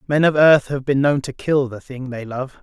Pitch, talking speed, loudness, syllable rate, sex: 135 Hz, 275 wpm, -18 LUFS, 4.9 syllables/s, male